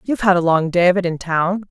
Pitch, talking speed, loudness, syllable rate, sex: 180 Hz, 315 wpm, -17 LUFS, 6.4 syllables/s, female